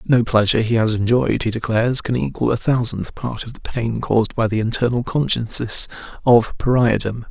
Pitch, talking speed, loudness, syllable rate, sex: 115 Hz, 180 wpm, -19 LUFS, 5.4 syllables/s, male